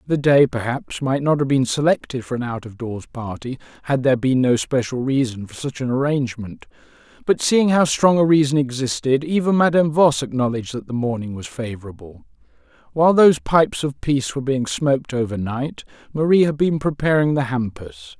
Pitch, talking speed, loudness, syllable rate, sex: 135 Hz, 185 wpm, -19 LUFS, 5.6 syllables/s, male